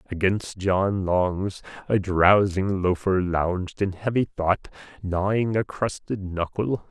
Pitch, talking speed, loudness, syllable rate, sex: 95 Hz, 120 wpm, -24 LUFS, 3.6 syllables/s, male